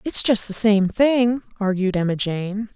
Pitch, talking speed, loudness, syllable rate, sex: 210 Hz, 175 wpm, -20 LUFS, 4.1 syllables/s, female